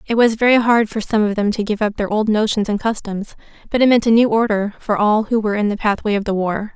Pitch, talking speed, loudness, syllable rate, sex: 215 Hz, 285 wpm, -17 LUFS, 6.1 syllables/s, female